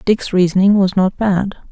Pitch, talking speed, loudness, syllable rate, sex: 190 Hz, 175 wpm, -15 LUFS, 4.8 syllables/s, female